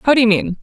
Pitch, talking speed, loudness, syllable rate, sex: 230 Hz, 385 wpm, -14 LUFS, 7.0 syllables/s, female